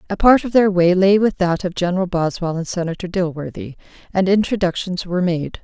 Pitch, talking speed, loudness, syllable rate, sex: 185 Hz, 190 wpm, -18 LUFS, 5.7 syllables/s, female